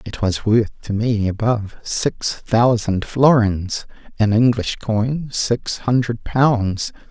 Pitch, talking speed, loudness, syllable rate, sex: 115 Hz, 125 wpm, -19 LUFS, 3.3 syllables/s, male